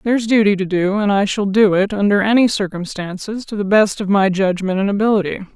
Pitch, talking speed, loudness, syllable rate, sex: 200 Hz, 215 wpm, -16 LUFS, 5.8 syllables/s, female